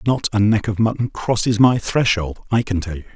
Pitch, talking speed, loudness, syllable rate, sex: 105 Hz, 230 wpm, -18 LUFS, 5.5 syllables/s, male